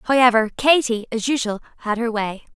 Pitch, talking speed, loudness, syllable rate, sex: 235 Hz, 165 wpm, -20 LUFS, 5.3 syllables/s, female